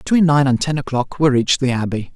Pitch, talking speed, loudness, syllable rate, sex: 135 Hz, 250 wpm, -17 LUFS, 6.3 syllables/s, male